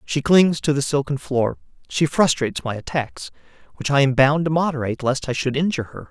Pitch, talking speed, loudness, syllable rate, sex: 145 Hz, 205 wpm, -20 LUFS, 5.7 syllables/s, male